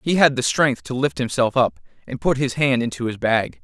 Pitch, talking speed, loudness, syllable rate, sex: 130 Hz, 250 wpm, -20 LUFS, 5.2 syllables/s, male